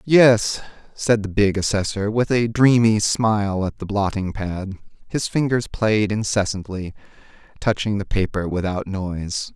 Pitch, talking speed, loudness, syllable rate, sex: 105 Hz, 140 wpm, -21 LUFS, 4.3 syllables/s, male